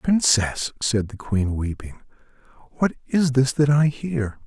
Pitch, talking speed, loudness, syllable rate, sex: 125 Hz, 150 wpm, -22 LUFS, 3.8 syllables/s, male